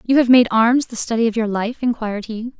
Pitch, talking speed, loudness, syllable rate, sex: 230 Hz, 255 wpm, -17 LUFS, 6.0 syllables/s, female